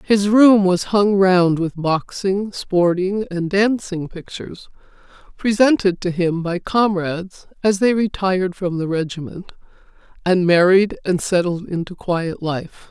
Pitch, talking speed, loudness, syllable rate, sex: 185 Hz, 135 wpm, -18 LUFS, 4.1 syllables/s, female